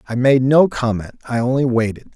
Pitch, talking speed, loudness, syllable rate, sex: 125 Hz, 195 wpm, -17 LUFS, 5.5 syllables/s, male